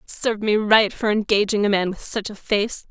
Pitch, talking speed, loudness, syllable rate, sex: 215 Hz, 225 wpm, -20 LUFS, 5.1 syllables/s, female